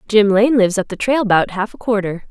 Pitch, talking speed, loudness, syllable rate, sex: 210 Hz, 260 wpm, -16 LUFS, 5.7 syllables/s, female